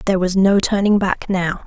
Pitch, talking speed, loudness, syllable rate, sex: 195 Hz, 215 wpm, -17 LUFS, 5.5 syllables/s, female